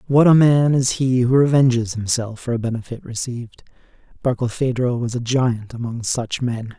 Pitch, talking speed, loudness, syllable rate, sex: 125 Hz, 170 wpm, -19 LUFS, 5.0 syllables/s, male